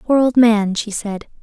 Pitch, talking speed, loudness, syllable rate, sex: 225 Hz, 210 wpm, -16 LUFS, 4.1 syllables/s, female